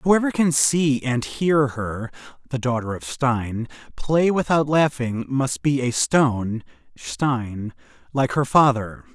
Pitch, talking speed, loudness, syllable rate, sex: 135 Hz, 140 wpm, -21 LUFS, 3.6 syllables/s, male